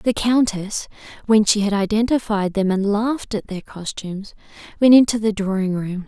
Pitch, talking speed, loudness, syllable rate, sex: 210 Hz, 170 wpm, -19 LUFS, 5.0 syllables/s, female